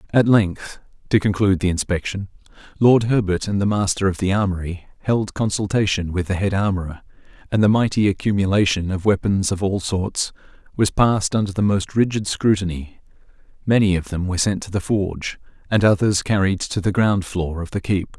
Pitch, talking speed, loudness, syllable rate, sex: 100 Hz, 180 wpm, -20 LUFS, 5.5 syllables/s, male